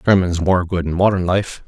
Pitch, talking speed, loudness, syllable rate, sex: 90 Hz, 215 wpm, -17 LUFS, 5.2 syllables/s, male